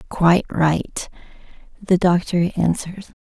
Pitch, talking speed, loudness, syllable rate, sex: 175 Hz, 95 wpm, -19 LUFS, 3.7 syllables/s, female